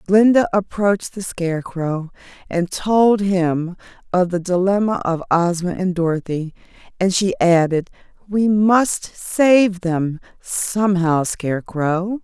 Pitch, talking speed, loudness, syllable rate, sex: 185 Hz, 115 wpm, -18 LUFS, 3.8 syllables/s, female